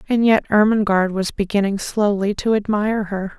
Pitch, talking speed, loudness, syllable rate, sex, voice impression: 205 Hz, 160 wpm, -18 LUFS, 5.4 syllables/s, female, feminine, adult-like, tensed, powerful, soft, slightly muffled, calm, friendly, reassuring, elegant, kind, modest